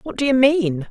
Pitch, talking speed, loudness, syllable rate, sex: 245 Hz, 265 wpm, -17 LUFS, 5.1 syllables/s, female